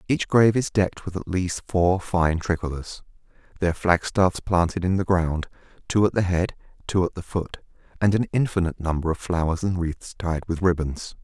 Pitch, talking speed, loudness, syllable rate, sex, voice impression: 90 Hz, 185 wpm, -24 LUFS, 5.1 syllables/s, male, very masculine, very adult-like, old, very thick, tensed, powerful, slightly dark, slightly hard, muffled, slightly fluent, slightly raspy, cool, very intellectual, sincere, very calm, very mature, friendly, very reassuring, very unique, elegant, wild, slightly sweet, slightly lively, kind, slightly modest